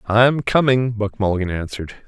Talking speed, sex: 145 wpm, male